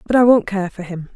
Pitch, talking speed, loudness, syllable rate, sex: 200 Hz, 310 wpm, -16 LUFS, 5.9 syllables/s, female